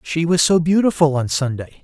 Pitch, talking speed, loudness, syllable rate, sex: 160 Hz, 195 wpm, -17 LUFS, 5.5 syllables/s, male